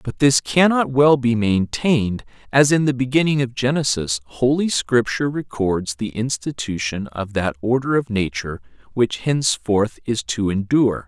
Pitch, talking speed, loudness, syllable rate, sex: 120 Hz, 145 wpm, -19 LUFS, 4.7 syllables/s, male